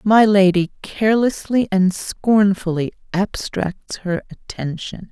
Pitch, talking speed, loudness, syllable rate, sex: 195 Hz, 95 wpm, -19 LUFS, 3.7 syllables/s, female